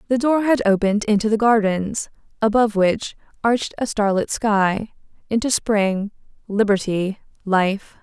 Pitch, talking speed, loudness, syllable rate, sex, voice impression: 210 Hz, 125 wpm, -20 LUFS, 4.6 syllables/s, female, very feminine, very adult-like, slightly middle-aged, thin, very tensed, powerful, very bright, soft, very clear, very fluent, cool, intellectual, slightly refreshing, slightly sincere, calm, friendly, reassuring, elegant, lively, slightly strict